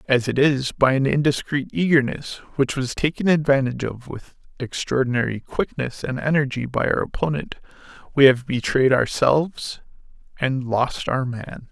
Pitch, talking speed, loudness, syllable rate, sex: 135 Hz, 145 wpm, -21 LUFS, 4.8 syllables/s, male